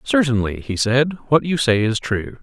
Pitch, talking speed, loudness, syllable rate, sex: 125 Hz, 200 wpm, -19 LUFS, 4.7 syllables/s, male